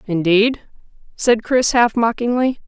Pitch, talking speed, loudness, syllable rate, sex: 230 Hz, 110 wpm, -16 LUFS, 4.0 syllables/s, female